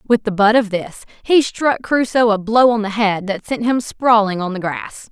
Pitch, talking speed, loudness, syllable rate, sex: 220 Hz, 235 wpm, -16 LUFS, 4.6 syllables/s, female